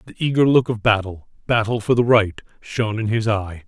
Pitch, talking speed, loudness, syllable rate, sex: 110 Hz, 180 wpm, -19 LUFS, 5.4 syllables/s, male